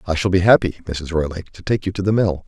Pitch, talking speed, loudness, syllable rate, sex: 90 Hz, 290 wpm, -19 LUFS, 6.6 syllables/s, male